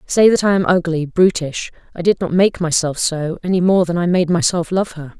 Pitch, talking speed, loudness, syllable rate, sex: 175 Hz, 230 wpm, -16 LUFS, 5.2 syllables/s, female